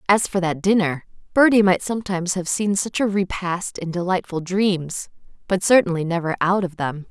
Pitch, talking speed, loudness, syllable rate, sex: 185 Hz, 170 wpm, -21 LUFS, 5.1 syllables/s, female